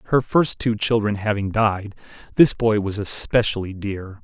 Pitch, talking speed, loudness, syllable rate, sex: 105 Hz, 155 wpm, -20 LUFS, 4.6 syllables/s, male